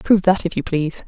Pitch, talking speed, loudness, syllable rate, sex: 180 Hz, 280 wpm, -19 LUFS, 7.2 syllables/s, female